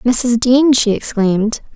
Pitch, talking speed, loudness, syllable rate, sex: 235 Hz, 135 wpm, -14 LUFS, 3.7 syllables/s, female